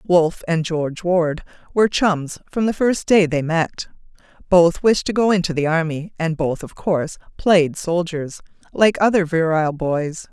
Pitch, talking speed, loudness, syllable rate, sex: 170 Hz, 170 wpm, -19 LUFS, 4.7 syllables/s, female